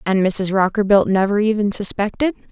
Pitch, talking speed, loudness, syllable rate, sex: 205 Hz, 145 wpm, -17 LUFS, 5.3 syllables/s, female